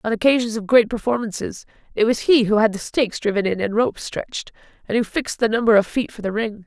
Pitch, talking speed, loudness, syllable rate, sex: 225 Hz, 245 wpm, -20 LUFS, 6.4 syllables/s, female